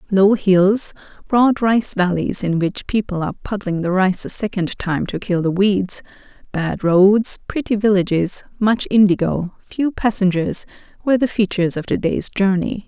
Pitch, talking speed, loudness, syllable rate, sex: 195 Hz, 160 wpm, -18 LUFS, 4.5 syllables/s, female